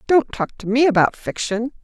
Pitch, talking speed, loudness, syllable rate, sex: 240 Hz, 195 wpm, -19 LUFS, 5.3 syllables/s, female